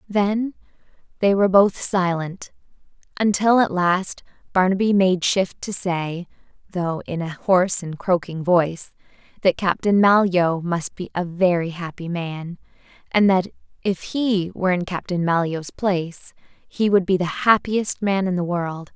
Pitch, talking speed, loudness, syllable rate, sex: 185 Hz, 150 wpm, -21 LUFS, 4.2 syllables/s, female